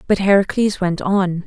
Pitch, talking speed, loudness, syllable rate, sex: 190 Hz, 165 wpm, -17 LUFS, 4.6 syllables/s, female